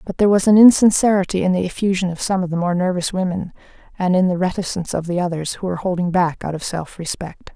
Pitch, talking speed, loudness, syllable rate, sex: 180 Hz, 240 wpm, -18 LUFS, 6.6 syllables/s, female